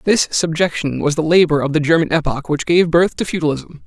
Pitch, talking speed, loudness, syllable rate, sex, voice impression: 160 Hz, 220 wpm, -16 LUFS, 5.5 syllables/s, male, masculine, adult-like, slightly powerful, fluent, slightly refreshing, unique, intense, slightly sharp